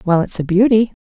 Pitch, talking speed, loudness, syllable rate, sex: 200 Hz, 230 wpm, -15 LUFS, 6.0 syllables/s, female